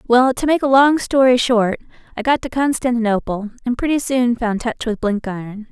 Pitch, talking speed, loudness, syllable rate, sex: 240 Hz, 190 wpm, -17 LUFS, 5.2 syllables/s, female